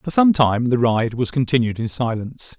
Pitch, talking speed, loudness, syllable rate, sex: 125 Hz, 210 wpm, -19 LUFS, 5.2 syllables/s, male